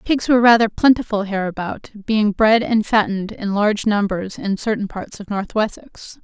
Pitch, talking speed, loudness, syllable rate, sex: 210 Hz, 175 wpm, -18 LUFS, 4.9 syllables/s, female